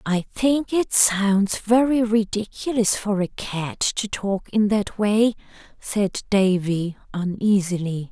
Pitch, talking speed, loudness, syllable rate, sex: 205 Hz, 125 wpm, -21 LUFS, 3.5 syllables/s, female